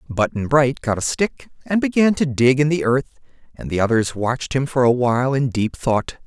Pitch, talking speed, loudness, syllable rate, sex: 130 Hz, 220 wpm, -19 LUFS, 5.2 syllables/s, male